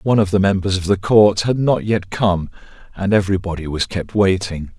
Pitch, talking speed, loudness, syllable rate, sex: 95 Hz, 200 wpm, -17 LUFS, 5.4 syllables/s, male